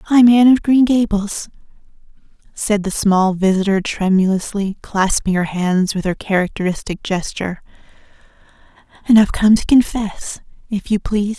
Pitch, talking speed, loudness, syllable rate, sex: 205 Hz, 130 wpm, -16 LUFS, 5.0 syllables/s, female